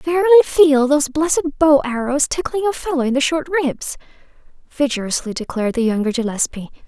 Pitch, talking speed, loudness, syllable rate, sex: 280 Hz, 155 wpm, -17 LUFS, 5.9 syllables/s, female